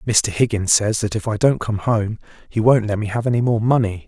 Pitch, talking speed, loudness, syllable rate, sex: 110 Hz, 250 wpm, -19 LUFS, 5.5 syllables/s, male